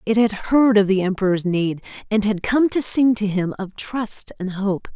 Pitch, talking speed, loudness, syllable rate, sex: 210 Hz, 220 wpm, -20 LUFS, 4.6 syllables/s, female